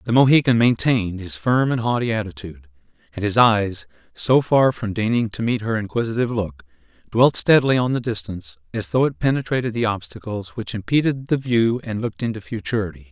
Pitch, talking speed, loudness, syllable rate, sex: 110 Hz, 180 wpm, -20 LUFS, 5.9 syllables/s, male